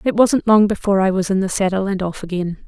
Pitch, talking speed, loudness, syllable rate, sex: 195 Hz, 270 wpm, -17 LUFS, 6.4 syllables/s, female